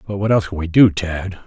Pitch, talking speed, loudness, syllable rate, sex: 95 Hz, 285 wpm, -17 LUFS, 6.4 syllables/s, male